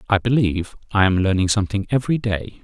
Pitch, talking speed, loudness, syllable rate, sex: 105 Hz, 185 wpm, -20 LUFS, 6.6 syllables/s, male